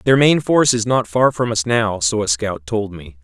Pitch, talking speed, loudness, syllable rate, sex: 110 Hz, 280 wpm, -17 LUFS, 5.2 syllables/s, male